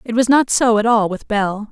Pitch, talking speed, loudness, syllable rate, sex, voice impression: 225 Hz, 280 wpm, -16 LUFS, 5.0 syllables/s, female, very feminine, slightly young, slightly adult-like, very thin, tensed, slightly powerful, bright, very hard, very clear, fluent, cool, very intellectual, very refreshing, sincere, calm, friendly, reassuring, slightly unique, elegant, sweet, lively, slightly strict, slightly sharp